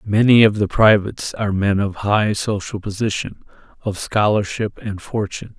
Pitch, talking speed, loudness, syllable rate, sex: 105 Hz, 150 wpm, -18 LUFS, 4.9 syllables/s, male